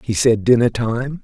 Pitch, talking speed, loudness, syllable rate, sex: 120 Hz, 195 wpm, -17 LUFS, 4.4 syllables/s, male